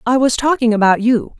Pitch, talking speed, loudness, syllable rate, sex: 240 Hz, 215 wpm, -14 LUFS, 5.6 syllables/s, female